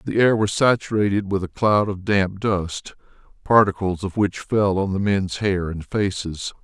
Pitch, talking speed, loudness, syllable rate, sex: 100 Hz, 180 wpm, -21 LUFS, 4.4 syllables/s, male